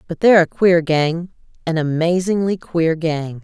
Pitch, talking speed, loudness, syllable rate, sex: 170 Hz, 140 wpm, -17 LUFS, 4.4 syllables/s, female